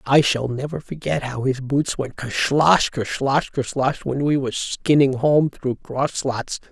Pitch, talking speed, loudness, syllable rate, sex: 135 Hz, 160 wpm, -21 LUFS, 4.0 syllables/s, male